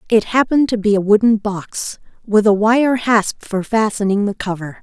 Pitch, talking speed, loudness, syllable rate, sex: 210 Hz, 185 wpm, -16 LUFS, 4.8 syllables/s, female